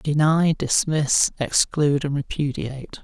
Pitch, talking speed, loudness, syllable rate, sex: 145 Hz, 100 wpm, -21 LUFS, 4.1 syllables/s, male